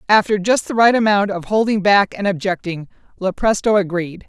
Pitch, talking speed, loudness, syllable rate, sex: 200 Hz, 170 wpm, -17 LUFS, 5.3 syllables/s, female